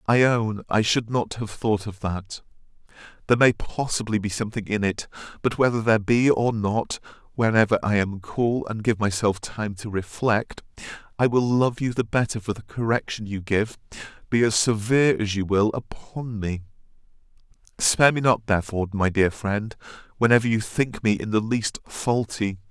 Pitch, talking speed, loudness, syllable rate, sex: 110 Hz, 175 wpm, -23 LUFS, 5.0 syllables/s, male